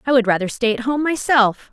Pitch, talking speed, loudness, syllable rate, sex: 245 Hz, 245 wpm, -18 LUFS, 5.7 syllables/s, female